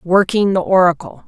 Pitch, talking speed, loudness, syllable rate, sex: 185 Hz, 140 wpm, -14 LUFS, 4.9 syllables/s, female